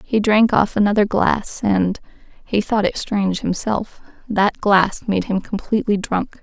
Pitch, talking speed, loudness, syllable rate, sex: 205 Hz, 140 wpm, -19 LUFS, 4.3 syllables/s, female